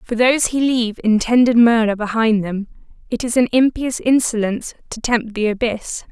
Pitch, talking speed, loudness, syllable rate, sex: 230 Hz, 165 wpm, -17 LUFS, 5.2 syllables/s, female